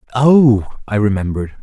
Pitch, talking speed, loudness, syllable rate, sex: 115 Hz, 110 wpm, -14 LUFS, 5.1 syllables/s, male